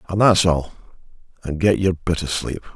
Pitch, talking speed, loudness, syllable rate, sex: 90 Hz, 175 wpm, -20 LUFS, 5.3 syllables/s, male